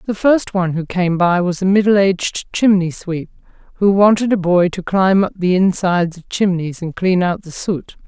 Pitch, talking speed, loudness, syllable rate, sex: 185 Hz, 210 wpm, -16 LUFS, 5.0 syllables/s, female